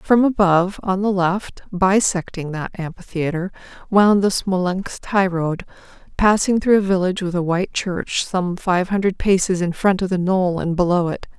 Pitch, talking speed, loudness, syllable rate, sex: 185 Hz, 170 wpm, -19 LUFS, 4.7 syllables/s, female